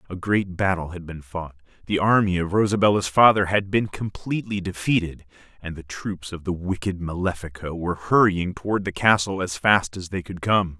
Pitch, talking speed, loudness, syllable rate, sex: 95 Hz, 185 wpm, -23 LUFS, 5.2 syllables/s, male